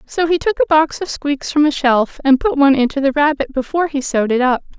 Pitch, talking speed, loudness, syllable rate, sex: 285 Hz, 265 wpm, -16 LUFS, 6.1 syllables/s, female